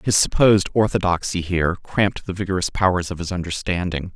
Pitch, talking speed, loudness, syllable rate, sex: 90 Hz, 160 wpm, -20 LUFS, 5.9 syllables/s, male